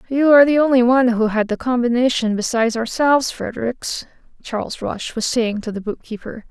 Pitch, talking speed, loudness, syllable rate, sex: 240 Hz, 175 wpm, -18 LUFS, 5.7 syllables/s, female